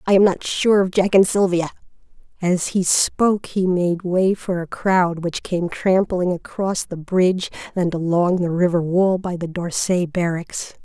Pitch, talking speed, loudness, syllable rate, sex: 180 Hz, 175 wpm, -19 LUFS, 4.2 syllables/s, female